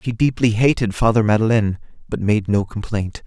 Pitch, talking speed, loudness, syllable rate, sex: 110 Hz, 165 wpm, -18 LUFS, 5.6 syllables/s, male